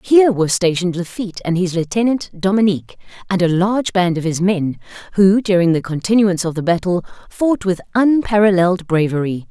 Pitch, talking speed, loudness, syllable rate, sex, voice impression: 190 Hz, 165 wpm, -16 LUFS, 5.9 syllables/s, female, feminine, adult-like, clear, slightly fluent, slightly refreshing, slightly sincere, slightly intense